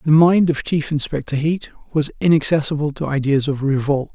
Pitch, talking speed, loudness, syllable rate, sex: 150 Hz, 175 wpm, -19 LUFS, 5.4 syllables/s, male